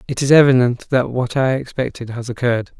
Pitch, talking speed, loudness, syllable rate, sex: 125 Hz, 195 wpm, -17 LUFS, 5.8 syllables/s, male